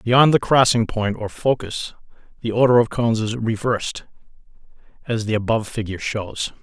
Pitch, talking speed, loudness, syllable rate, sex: 115 Hz, 155 wpm, -20 LUFS, 5.3 syllables/s, male